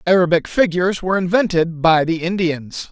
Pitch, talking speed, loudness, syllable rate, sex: 175 Hz, 145 wpm, -17 LUFS, 5.4 syllables/s, male